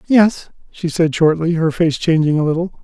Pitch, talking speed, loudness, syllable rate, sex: 165 Hz, 190 wpm, -16 LUFS, 4.8 syllables/s, male